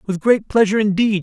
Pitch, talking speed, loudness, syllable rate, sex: 205 Hz, 195 wpm, -16 LUFS, 5.7 syllables/s, male